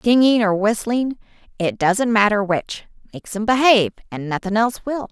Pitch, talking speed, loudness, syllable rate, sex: 215 Hz, 140 wpm, -18 LUFS, 5.2 syllables/s, female